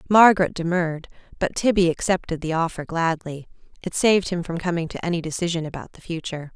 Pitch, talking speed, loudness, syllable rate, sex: 170 Hz, 175 wpm, -22 LUFS, 6.3 syllables/s, female